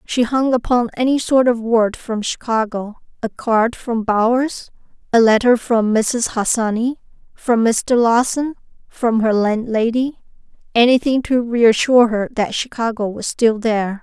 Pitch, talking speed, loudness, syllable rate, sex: 230 Hz, 135 wpm, -17 LUFS, 4.3 syllables/s, female